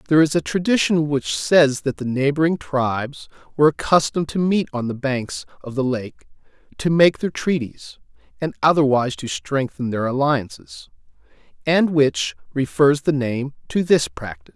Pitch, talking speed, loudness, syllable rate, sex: 135 Hz, 155 wpm, -20 LUFS, 4.9 syllables/s, male